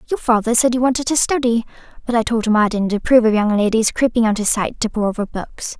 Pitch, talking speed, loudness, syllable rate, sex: 230 Hz, 260 wpm, -17 LUFS, 6.4 syllables/s, female